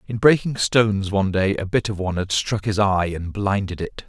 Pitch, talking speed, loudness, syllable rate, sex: 100 Hz, 235 wpm, -21 LUFS, 5.3 syllables/s, male